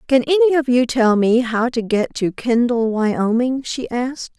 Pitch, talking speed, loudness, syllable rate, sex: 245 Hz, 190 wpm, -18 LUFS, 4.6 syllables/s, female